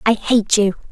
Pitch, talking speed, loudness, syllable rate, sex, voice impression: 215 Hz, 195 wpm, -16 LUFS, 4.4 syllables/s, female, feminine, slightly gender-neutral, very young, very thin, very tensed, slightly weak, very bright, hard, very clear, fluent, slightly raspy, cute, slightly intellectual, very refreshing, slightly sincere, very unique, wild, lively, slightly intense, slightly sharp, slightly light